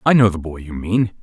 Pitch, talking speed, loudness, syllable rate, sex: 100 Hz, 295 wpm, -19 LUFS, 5.6 syllables/s, male